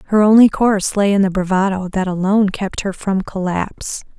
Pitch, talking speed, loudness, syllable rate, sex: 195 Hz, 185 wpm, -16 LUFS, 5.5 syllables/s, female